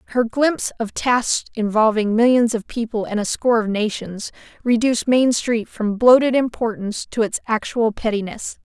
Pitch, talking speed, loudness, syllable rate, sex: 225 Hz, 160 wpm, -19 LUFS, 5.1 syllables/s, female